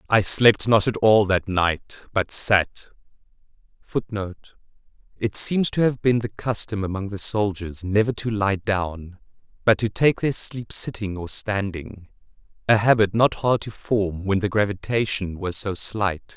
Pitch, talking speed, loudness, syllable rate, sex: 105 Hz, 160 wpm, -22 LUFS, 4.3 syllables/s, male